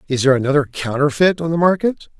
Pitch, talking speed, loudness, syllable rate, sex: 150 Hz, 190 wpm, -17 LUFS, 6.8 syllables/s, male